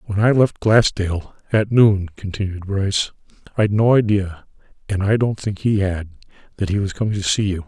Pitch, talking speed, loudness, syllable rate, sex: 100 Hz, 165 wpm, -19 LUFS, 5.2 syllables/s, male